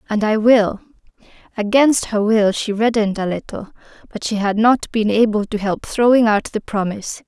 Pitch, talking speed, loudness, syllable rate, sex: 220 Hz, 180 wpm, -17 LUFS, 5.1 syllables/s, female